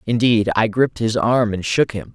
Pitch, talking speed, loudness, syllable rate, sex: 110 Hz, 225 wpm, -18 LUFS, 5.0 syllables/s, male